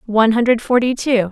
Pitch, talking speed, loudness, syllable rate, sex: 230 Hz, 185 wpm, -15 LUFS, 6.0 syllables/s, female